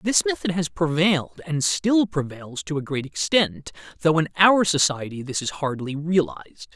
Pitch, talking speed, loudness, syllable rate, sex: 155 Hz, 170 wpm, -22 LUFS, 4.7 syllables/s, male